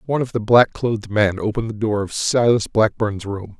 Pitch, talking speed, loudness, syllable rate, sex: 110 Hz, 215 wpm, -19 LUFS, 5.5 syllables/s, male